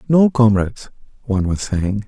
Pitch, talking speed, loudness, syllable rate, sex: 110 Hz, 145 wpm, -17 LUFS, 5.3 syllables/s, male